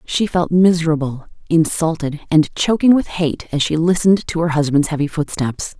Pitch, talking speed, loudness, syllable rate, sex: 160 Hz, 165 wpm, -17 LUFS, 5.1 syllables/s, female